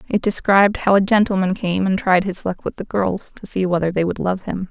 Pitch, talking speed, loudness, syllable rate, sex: 190 Hz, 255 wpm, -19 LUFS, 5.5 syllables/s, female